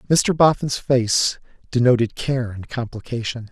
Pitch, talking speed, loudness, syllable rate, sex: 125 Hz, 120 wpm, -20 LUFS, 4.3 syllables/s, male